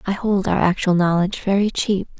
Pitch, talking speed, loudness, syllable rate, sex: 190 Hz, 190 wpm, -19 LUFS, 5.6 syllables/s, female